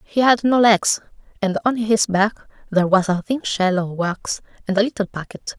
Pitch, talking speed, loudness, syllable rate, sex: 205 Hz, 205 wpm, -19 LUFS, 4.8 syllables/s, female